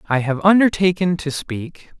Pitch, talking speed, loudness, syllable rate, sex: 165 Hz, 150 wpm, -18 LUFS, 4.6 syllables/s, male